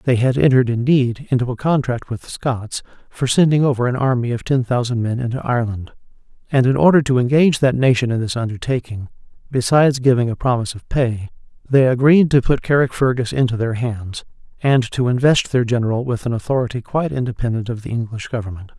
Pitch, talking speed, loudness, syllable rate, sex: 125 Hz, 190 wpm, -18 LUFS, 6.1 syllables/s, male